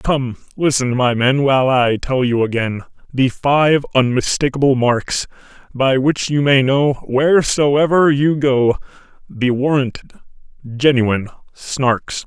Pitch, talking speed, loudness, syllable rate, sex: 130 Hz, 120 wpm, -16 LUFS, 4.0 syllables/s, male